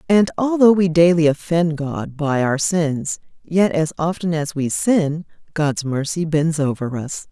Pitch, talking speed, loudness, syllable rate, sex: 160 Hz, 165 wpm, -19 LUFS, 4.0 syllables/s, female